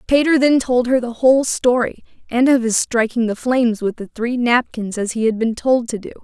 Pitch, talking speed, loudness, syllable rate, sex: 240 Hz, 230 wpm, -17 LUFS, 5.3 syllables/s, female